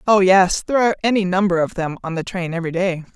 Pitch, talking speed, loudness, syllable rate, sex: 185 Hz, 245 wpm, -18 LUFS, 6.9 syllables/s, female